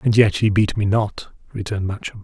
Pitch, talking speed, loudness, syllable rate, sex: 105 Hz, 215 wpm, -19 LUFS, 5.7 syllables/s, male